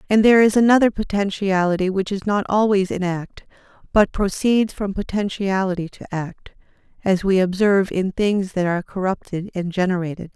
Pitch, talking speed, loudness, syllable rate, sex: 195 Hz, 155 wpm, -20 LUFS, 5.2 syllables/s, female